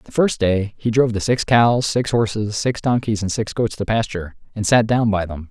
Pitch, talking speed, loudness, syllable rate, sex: 110 Hz, 240 wpm, -19 LUFS, 5.1 syllables/s, male